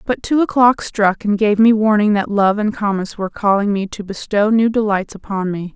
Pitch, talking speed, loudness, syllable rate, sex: 205 Hz, 220 wpm, -16 LUFS, 5.1 syllables/s, female